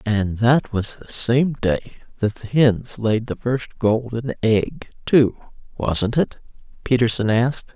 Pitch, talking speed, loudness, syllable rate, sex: 115 Hz, 145 wpm, -20 LUFS, 3.8 syllables/s, female